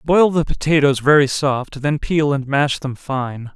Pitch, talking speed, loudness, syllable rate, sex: 145 Hz, 185 wpm, -17 LUFS, 4.1 syllables/s, male